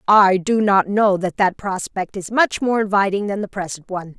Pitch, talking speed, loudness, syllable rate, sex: 195 Hz, 215 wpm, -19 LUFS, 5.0 syllables/s, female